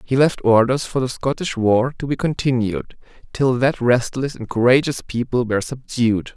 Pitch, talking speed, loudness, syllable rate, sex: 125 Hz, 170 wpm, -19 LUFS, 4.8 syllables/s, male